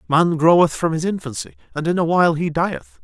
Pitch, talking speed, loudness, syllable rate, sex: 155 Hz, 220 wpm, -18 LUFS, 5.7 syllables/s, male